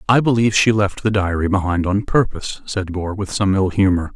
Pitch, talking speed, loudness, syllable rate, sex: 100 Hz, 215 wpm, -18 LUFS, 5.6 syllables/s, male